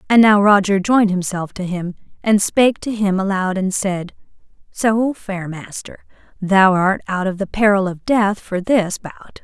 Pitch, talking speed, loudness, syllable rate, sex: 195 Hz, 180 wpm, -17 LUFS, 4.4 syllables/s, female